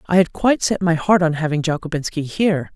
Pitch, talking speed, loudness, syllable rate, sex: 170 Hz, 220 wpm, -19 LUFS, 6.1 syllables/s, female